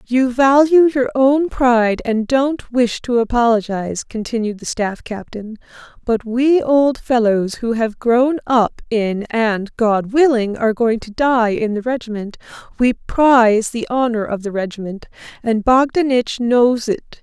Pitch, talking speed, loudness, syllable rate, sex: 235 Hz, 155 wpm, -16 LUFS, 4.2 syllables/s, female